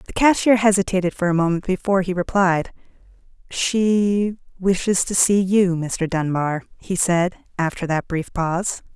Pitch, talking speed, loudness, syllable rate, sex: 185 Hz, 140 wpm, -20 LUFS, 4.6 syllables/s, female